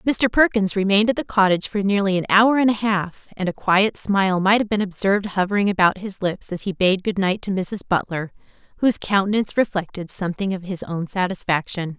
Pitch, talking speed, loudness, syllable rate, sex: 195 Hz, 205 wpm, -20 LUFS, 5.8 syllables/s, female